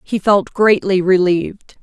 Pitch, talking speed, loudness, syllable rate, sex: 195 Hz, 130 wpm, -14 LUFS, 4.2 syllables/s, female